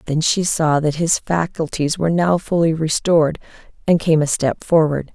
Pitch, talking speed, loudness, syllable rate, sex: 160 Hz, 175 wpm, -18 LUFS, 4.9 syllables/s, female